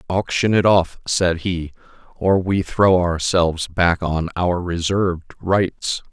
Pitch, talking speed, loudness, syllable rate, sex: 90 Hz, 135 wpm, -19 LUFS, 3.7 syllables/s, male